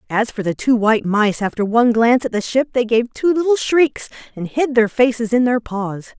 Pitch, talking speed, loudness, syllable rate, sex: 235 Hz, 235 wpm, -17 LUFS, 5.4 syllables/s, female